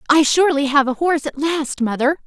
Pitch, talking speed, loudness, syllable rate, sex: 290 Hz, 210 wpm, -17 LUFS, 5.9 syllables/s, female